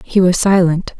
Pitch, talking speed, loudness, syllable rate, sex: 180 Hz, 180 wpm, -13 LUFS, 4.5 syllables/s, female